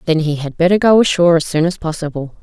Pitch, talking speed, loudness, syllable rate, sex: 165 Hz, 245 wpm, -15 LUFS, 6.7 syllables/s, female